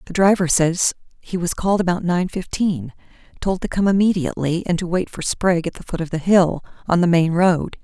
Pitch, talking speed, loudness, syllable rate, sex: 175 Hz, 215 wpm, -19 LUFS, 5.5 syllables/s, female